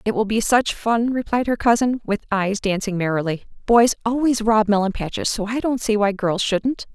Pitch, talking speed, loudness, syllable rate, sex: 215 Hz, 205 wpm, -20 LUFS, 5.0 syllables/s, female